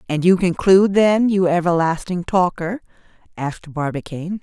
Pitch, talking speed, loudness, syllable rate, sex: 180 Hz, 120 wpm, -18 LUFS, 5.1 syllables/s, female